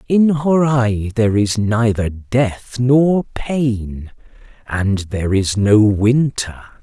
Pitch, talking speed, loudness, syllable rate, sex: 115 Hz, 115 wpm, -16 LUFS, 3.1 syllables/s, male